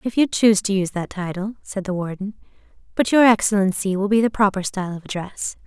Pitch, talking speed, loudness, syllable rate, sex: 200 Hz, 210 wpm, -20 LUFS, 6.2 syllables/s, female